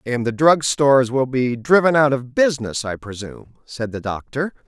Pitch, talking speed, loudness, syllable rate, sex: 130 Hz, 195 wpm, -18 LUFS, 5.2 syllables/s, male